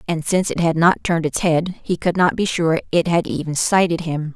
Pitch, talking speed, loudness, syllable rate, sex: 170 Hz, 250 wpm, -19 LUFS, 5.5 syllables/s, female